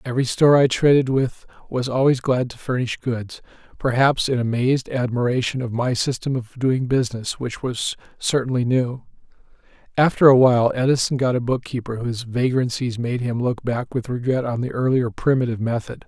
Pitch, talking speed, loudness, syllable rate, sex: 125 Hz, 170 wpm, -21 LUFS, 5.4 syllables/s, male